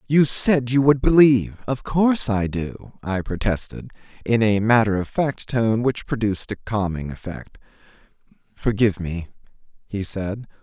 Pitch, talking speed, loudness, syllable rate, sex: 115 Hz, 145 wpm, -21 LUFS, 4.6 syllables/s, male